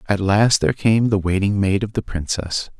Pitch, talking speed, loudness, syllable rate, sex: 100 Hz, 215 wpm, -19 LUFS, 5.1 syllables/s, male